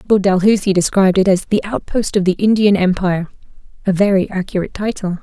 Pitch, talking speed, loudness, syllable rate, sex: 195 Hz, 160 wpm, -15 LUFS, 6.3 syllables/s, female